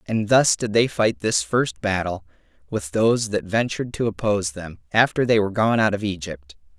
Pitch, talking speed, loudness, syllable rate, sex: 105 Hz, 195 wpm, -21 LUFS, 5.3 syllables/s, male